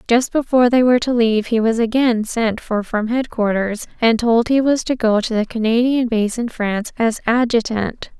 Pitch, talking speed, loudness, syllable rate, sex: 230 Hz, 200 wpm, -17 LUFS, 5.0 syllables/s, female